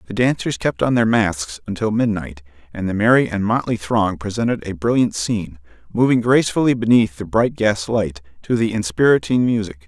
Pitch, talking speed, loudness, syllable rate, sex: 105 Hz, 175 wpm, -18 LUFS, 5.3 syllables/s, male